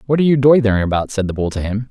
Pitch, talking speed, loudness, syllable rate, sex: 115 Hz, 315 wpm, -16 LUFS, 8.0 syllables/s, male